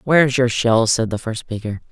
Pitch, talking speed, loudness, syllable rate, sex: 120 Hz, 220 wpm, -18 LUFS, 5.1 syllables/s, male